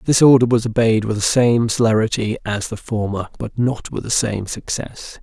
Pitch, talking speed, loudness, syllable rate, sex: 115 Hz, 195 wpm, -18 LUFS, 4.9 syllables/s, male